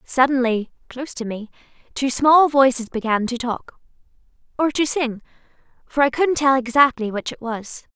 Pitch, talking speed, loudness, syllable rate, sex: 255 Hz, 150 wpm, -19 LUFS, 4.8 syllables/s, female